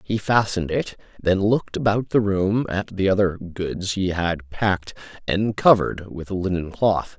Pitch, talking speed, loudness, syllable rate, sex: 95 Hz, 175 wpm, -22 LUFS, 4.6 syllables/s, male